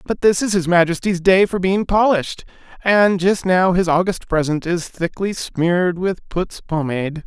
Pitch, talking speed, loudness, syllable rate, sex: 180 Hz, 175 wpm, -18 LUFS, 4.9 syllables/s, male